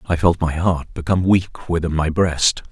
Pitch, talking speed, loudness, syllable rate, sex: 85 Hz, 200 wpm, -19 LUFS, 4.8 syllables/s, male